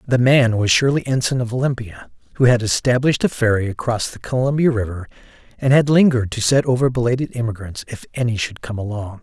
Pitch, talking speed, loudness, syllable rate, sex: 120 Hz, 190 wpm, -18 LUFS, 6.1 syllables/s, male